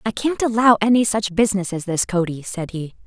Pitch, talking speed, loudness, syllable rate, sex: 205 Hz, 215 wpm, -19 LUFS, 5.6 syllables/s, female